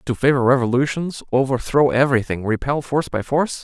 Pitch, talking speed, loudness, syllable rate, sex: 130 Hz, 150 wpm, -19 LUFS, 6.1 syllables/s, male